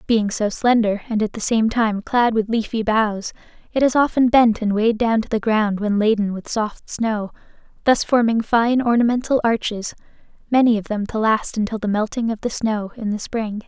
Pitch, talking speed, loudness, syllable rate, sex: 220 Hz, 200 wpm, -19 LUFS, 4.9 syllables/s, female